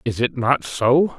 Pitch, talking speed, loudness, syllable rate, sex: 130 Hz, 205 wpm, -19 LUFS, 3.7 syllables/s, male